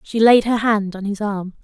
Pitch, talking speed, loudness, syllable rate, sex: 210 Hz, 255 wpm, -17 LUFS, 4.7 syllables/s, female